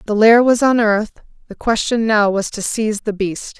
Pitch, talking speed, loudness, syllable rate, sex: 215 Hz, 200 wpm, -16 LUFS, 5.3 syllables/s, female